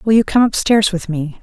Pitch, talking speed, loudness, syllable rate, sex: 200 Hz, 255 wpm, -15 LUFS, 5.3 syllables/s, female